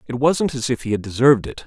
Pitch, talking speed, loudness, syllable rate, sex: 125 Hz, 290 wpm, -19 LUFS, 6.5 syllables/s, male